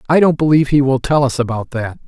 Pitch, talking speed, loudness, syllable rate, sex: 135 Hz, 260 wpm, -15 LUFS, 6.5 syllables/s, male